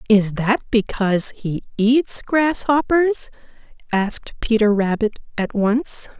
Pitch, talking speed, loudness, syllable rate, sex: 230 Hz, 105 wpm, -19 LUFS, 3.8 syllables/s, female